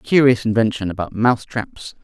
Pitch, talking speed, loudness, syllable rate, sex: 115 Hz, 175 wpm, -18 LUFS, 5.7 syllables/s, male